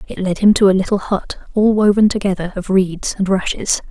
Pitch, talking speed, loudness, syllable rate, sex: 195 Hz, 215 wpm, -16 LUFS, 5.5 syllables/s, female